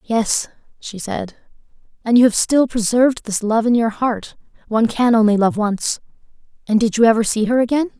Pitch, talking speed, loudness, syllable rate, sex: 225 Hz, 175 wpm, -17 LUFS, 5.3 syllables/s, female